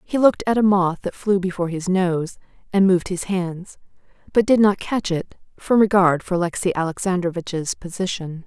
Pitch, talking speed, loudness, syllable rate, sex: 185 Hz, 175 wpm, -20 LUFS, 5.2 syllables/s, female